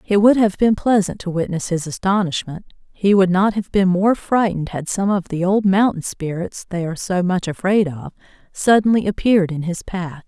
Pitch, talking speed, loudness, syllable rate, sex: 190 Hz, 200 wpm, -18 LUFS, 5.2 syllables/s, female